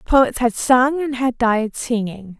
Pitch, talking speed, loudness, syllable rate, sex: 240 Hz, 175 wpm, -18 LUFS, 3.5 syllables/s, female